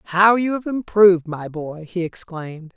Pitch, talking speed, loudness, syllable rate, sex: 185 Hz, 175 wpm, -19 LUFS, 4.9 syllables/s, female